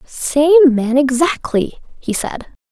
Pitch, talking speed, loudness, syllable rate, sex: 275 Hz, 110 wpm, -14 LUFS, 3.4 syllables/s, female